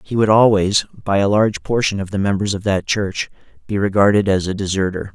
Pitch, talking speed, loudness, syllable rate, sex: 100 Hz, 210 wpm, -17 LUFS, 5.6 syllables/s, male